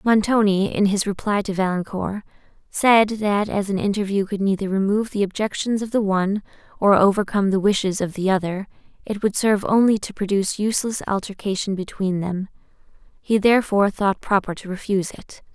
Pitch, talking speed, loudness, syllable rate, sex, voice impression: 200 Hz, 165 wpm, -21 LUFS, 5.7 syllables/s, female, feminine, slightly young, slightly weak, slightly halting, slightly cute, slightly kind, slightly modest